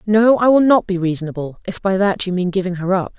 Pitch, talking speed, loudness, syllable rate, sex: 190 Hz, 265 wpm, -17 LUFS, 6.0 syllables/s, female